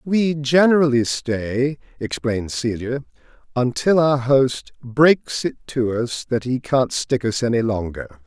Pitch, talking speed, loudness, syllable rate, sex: 125 Hz, 140 wpm, -20 LUFS, 3.9 syllables/s, male